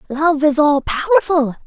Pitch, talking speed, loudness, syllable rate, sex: 300 Hz, 145 wpm, -15 LUFS, 4.3 syllables/s, female